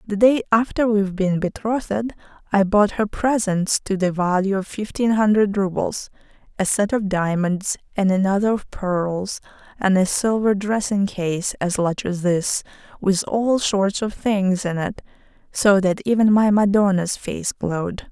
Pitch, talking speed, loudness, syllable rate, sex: 200 Hz, 155 wpm, -20 LUFS, 4.3 syllables/s, female